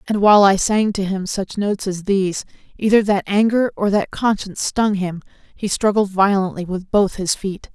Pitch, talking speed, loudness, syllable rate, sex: 200 Hz, 195 wpm, -18 LUFS, 5.1 syllables/s, female